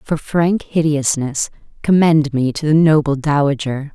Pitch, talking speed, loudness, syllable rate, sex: 150 Hz, 135 wpm, -16 LUFS, 4.3 syllables/s, female